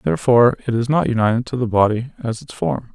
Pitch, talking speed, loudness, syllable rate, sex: 120 Hz, 225 wpm, -18 LUFS, 6.5 syllables/s, male